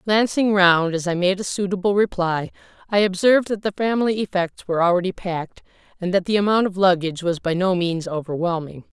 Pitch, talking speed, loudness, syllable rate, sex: 185 Hz, 185 wpm, -20 LUFS, 5.9 syllables/s, female